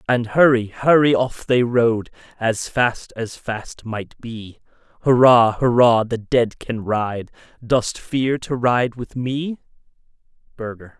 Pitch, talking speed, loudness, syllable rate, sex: 120 Hz, 135 wpm, -19 LUFS, 3.5 syllables/s, male